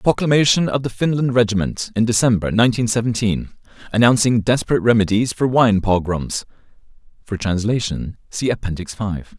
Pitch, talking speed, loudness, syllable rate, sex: 110 Hz, 135 wpm, -18 LUFS, 5.6 syllables/s, male